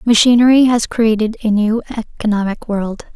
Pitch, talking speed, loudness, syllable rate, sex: 220 Hz, 135 wpm, -14 LUFS, 5.0 syllables/s, female